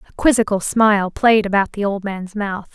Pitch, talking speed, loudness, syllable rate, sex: 205 Hz, 195 wpm, -17 LUFS, 5.1 syllables/s, female